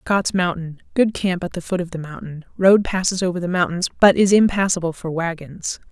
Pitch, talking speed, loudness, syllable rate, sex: 180 Hz, 195 wpm, -19 LUFS, 5.3 syllables/s, female